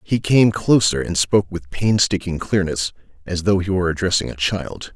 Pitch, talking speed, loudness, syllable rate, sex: 95 Hz, 180 wpm, -19 LUFS, 5.1 syllables/s, male